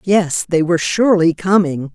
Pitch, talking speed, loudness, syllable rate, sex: 175 Hz, 155 wpm, -15 LUFS, 5.0 syllables/s, female